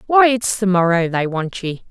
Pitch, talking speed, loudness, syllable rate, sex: 195 Hz, 220 wpm, -17 LUFS, 4.7 syllables/s, female